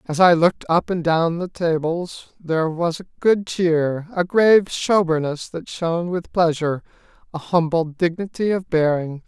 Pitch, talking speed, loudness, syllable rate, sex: 170 Hz, 160 wpm, -20 LUFS, 4.6 syllables/s, male